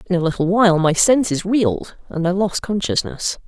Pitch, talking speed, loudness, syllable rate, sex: 185 Hz, 190 wpm, -18 LUFS, 5.4 syllables/s, female